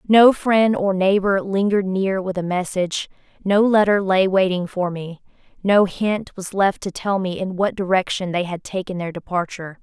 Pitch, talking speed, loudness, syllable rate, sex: 190 Hz, 185 wpm, -20 LUFS, 4.8 syllables/s, female